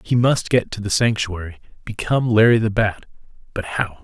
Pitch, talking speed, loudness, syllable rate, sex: 110 Hz, 165 wpm, -19 LUFS, 5.3 syllables/s, male